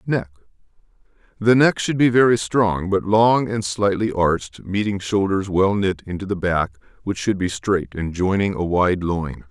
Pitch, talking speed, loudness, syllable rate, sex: 100 Hz, 170 wpm, -20 LUFS, 4.5 syllables/s, male